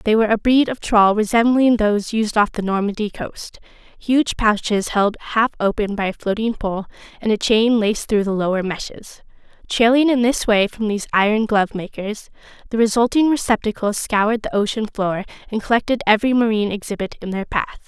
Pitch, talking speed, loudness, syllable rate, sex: 215 Hz, 180 wpm, -19 LUFS, 5.5 syllables/s, female